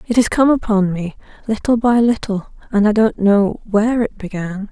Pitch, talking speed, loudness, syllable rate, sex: 215 Hz, 190 wpm, -16 LUFS, 4.9 syllables/s, female